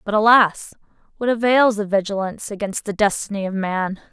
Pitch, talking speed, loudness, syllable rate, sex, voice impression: 205 Hz, 160 wpm, -19 LUFS, 5.5 syllables/s, female, very feminine, slightly young, slightly adult-like, very thin, slightly tensed, slightly weak, bright, slightly hard, clear, fluent, very cute, slightly cool, very intellectual, very refreshing, sincere, calm, friendly, reassuring, very unique, elegant, slightly wild, very sweet, lively, very kind, slightly sharp, very modest